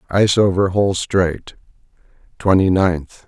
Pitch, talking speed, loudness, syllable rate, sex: 90 Hz, 110 wpm, -17 LUFS, 4.4 syllables/s, male